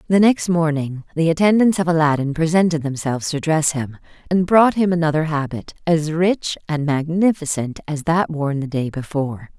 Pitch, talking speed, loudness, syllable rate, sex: 160 Hz, 170 wpm, -19 LUFS, 5.1 syllables/s, female